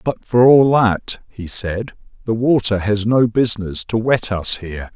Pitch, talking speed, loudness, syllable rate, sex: 110 Hz, 180 wpm, -16 LUFS, 4.3 syllables/s, male